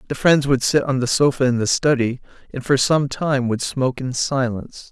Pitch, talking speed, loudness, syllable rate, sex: 130 Hz, 220 wpm, -19 LUFS, 5.3 syllables/s, male